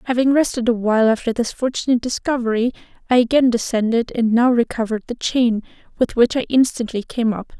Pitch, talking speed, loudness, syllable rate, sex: 240 Hz, 175 wpm, -18 LUFS, 6.1 syllables/s, female